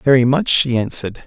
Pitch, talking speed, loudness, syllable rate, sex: 125 Hz, 190 wpm, -16 LUFS, 6.0 syllables/s, male